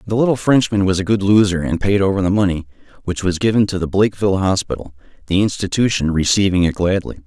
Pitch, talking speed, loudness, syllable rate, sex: 95 Hz, 200 wpm, -17 LUFS, 6.4 syllables/s, male